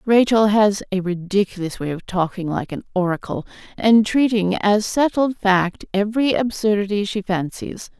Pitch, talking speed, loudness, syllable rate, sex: 205 Hz, 145 wpm, -19 LUFS, 4.7 syllables/s, female